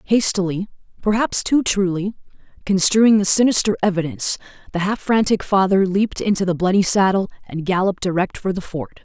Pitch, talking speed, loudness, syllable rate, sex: 195 Hz, 140 wpm, -18 LUFS, 5.6 syllables/s, female